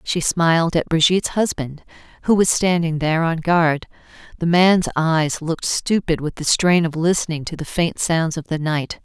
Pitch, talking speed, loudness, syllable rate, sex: 165 Hz, 185 wpm, -19 LUFS, 4.8 syllables/s, female